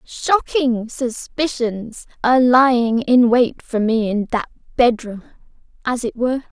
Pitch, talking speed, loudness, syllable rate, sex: 240 Hz, 130 wpm, -18 LUFS, 4.0 syllables/s, female